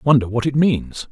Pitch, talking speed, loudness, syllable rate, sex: 130 Hz, 215 wpm, -18 LUFS, 4.7 syllables/s, male